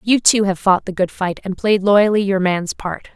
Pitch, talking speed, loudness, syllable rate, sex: 195 Hz, 250 wpm, -17 LUFS, 4.6 syllables/s, female